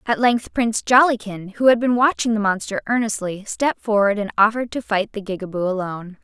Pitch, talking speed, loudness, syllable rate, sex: 215 Hz, 190 wpm, -20 LUFS, 5.9 syllables/s, female